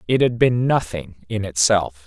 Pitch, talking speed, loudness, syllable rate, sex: 105 Hz, 175 wpm, -19 LUFS, 4.3 syllables/s, male